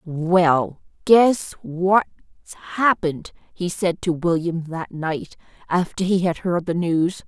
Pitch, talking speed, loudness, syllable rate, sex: 175 Hz, 130 wpm, -20 LUFS, 3.5 syllables/s, female